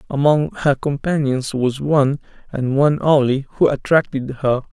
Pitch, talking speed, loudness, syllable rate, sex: 140 Hz, 140 wpm, -18 LUFS, 4.7 syllables/s, male